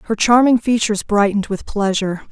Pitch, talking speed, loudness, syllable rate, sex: 210 Hz, 155 wpm, -16 LUFS, 6.2 syllables/s, female